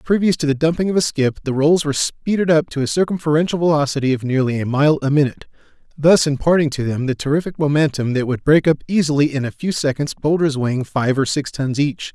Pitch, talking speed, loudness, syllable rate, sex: 145 Hz, 220 wpm, -18 LUFS, 6.3 syllables/s, male